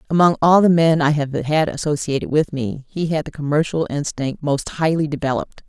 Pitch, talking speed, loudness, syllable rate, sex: 150 Hz, 190 wpm, -19 LUFS, 5.4 syllables/s, female